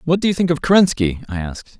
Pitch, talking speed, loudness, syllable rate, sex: 145 Hz, 270 wpm, -17 LUFS, 7.0 syllables/s, male